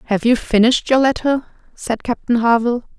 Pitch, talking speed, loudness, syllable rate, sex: 240 Hz, 160 wpm, -17 LUFS, 5.9 syllables/s, female